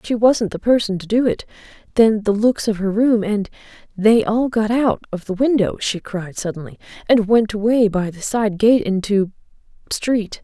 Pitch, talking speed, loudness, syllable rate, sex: 215 Hz, 185 wpm, -18 LUFS, 4.7 syllables/s, female